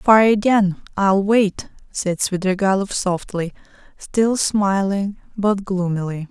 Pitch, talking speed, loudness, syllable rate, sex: 195 Hz, 105 wpm, -19 LUFS, 3.6 syllables/s, female